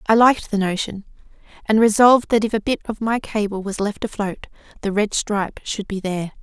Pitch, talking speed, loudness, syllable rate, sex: 210 Hz, 205 wpm, -20 LUFS, 5.8 syllables/s, female